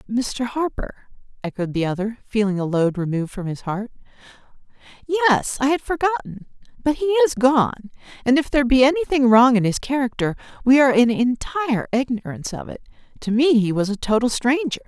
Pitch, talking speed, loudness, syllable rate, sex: 245 Hz, 175 wpm, -20 LUFS, 5.6 syllables/s, female